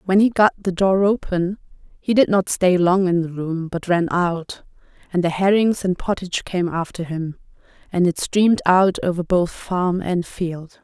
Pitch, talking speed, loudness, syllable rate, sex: 180 Hz, 190 wpm, -20 LUFS, 4.4 syllables/s, female